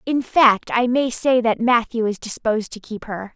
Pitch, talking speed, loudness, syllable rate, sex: 235 Hz, 215 wpm, -19 LUFS, 4.7 syllables/s, female